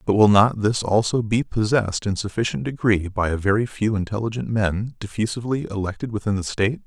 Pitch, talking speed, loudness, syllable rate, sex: 105 Hz, 185 wpm, -22 LUFS, 5.8 syllables/s, male